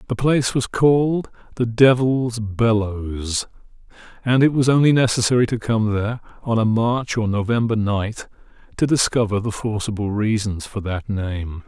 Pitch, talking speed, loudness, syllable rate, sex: 115 Hz, 150 wpm, -20 LUFS, 4.6 syllables/s, male